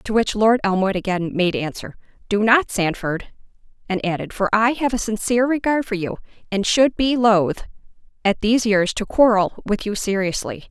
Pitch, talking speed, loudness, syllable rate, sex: 210 Hz, 180 wpm, -20 LUFS, 5.1 syllables/s, female